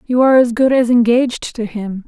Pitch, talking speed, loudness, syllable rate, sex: 240 Hz, 230 wpm, -14 LUFS, 5.6 syllables/s, female